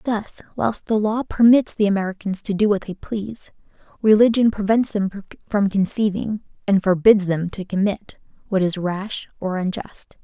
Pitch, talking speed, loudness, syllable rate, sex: 205 Hz, 160 wpm, -20 LUFS, 4.7 syllables/s, female